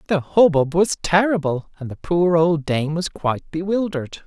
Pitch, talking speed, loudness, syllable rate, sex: 165 Hz, 170 wpm, -19 LUFS, 4.8 syllables/s, male